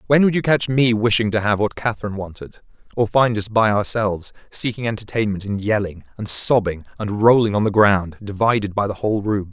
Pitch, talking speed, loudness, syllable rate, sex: 105 Hz, 200 wpm, -19 LUFS, 5.8 syllables/s, male